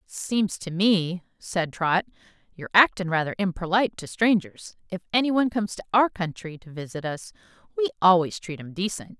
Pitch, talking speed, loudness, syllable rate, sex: 190 Hz, 165 wpm, -24 LUFS, 5.3 syllables/s, female